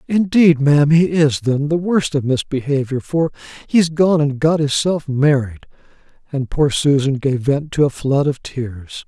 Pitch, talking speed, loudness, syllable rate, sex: 145 Hz, 170 wpm, -17 LUFS, 4.4 syllables/s, male